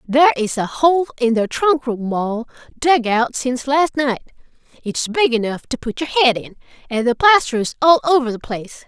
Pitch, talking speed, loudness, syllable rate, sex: 260 Hz, 195 wpm, -17 LUFS, 4.9 syllables/s, female